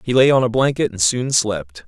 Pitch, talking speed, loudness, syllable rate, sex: 115 Hz, 255 wpm, -17 LUFS, 5.1 syllables/s, male